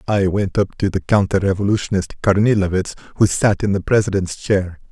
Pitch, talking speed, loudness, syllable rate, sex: 95 Hz, 170 wpm, -18 LUFS, 5.5 syllables/s, male